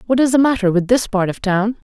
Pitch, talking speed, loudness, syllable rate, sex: 220 Hz, 280 wpm, -16 LUFS, 6.1 syllables/s, female